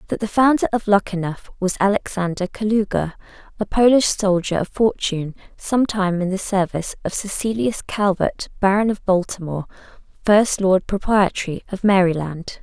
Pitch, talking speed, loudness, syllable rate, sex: 195 Hz, 140 wpm, -20 LUFS, 5.1 syllables/s, female